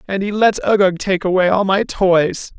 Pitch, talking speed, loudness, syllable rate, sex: 190 Hz, 210 wpm, -16 LUFS, 4.6 syllables/s, male